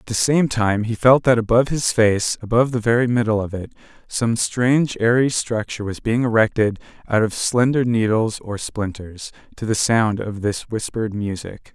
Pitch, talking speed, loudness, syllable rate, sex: 115 Hz, 185 wpm, -19 LUFS, 5.0 syllables/s, male